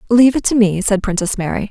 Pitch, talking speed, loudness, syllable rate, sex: 210 Hz, 245 wpm, -15 LUFS, 6.6 syllables/s, female